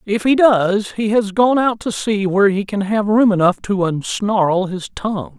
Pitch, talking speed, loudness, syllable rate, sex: 200 Hz, 210 wpm, -16 LUFS, 4.4 syllables/s, male